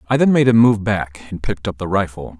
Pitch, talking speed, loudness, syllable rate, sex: 100 Hz, 275 wpm, -17 LUFS, 6.1 syllables/s, male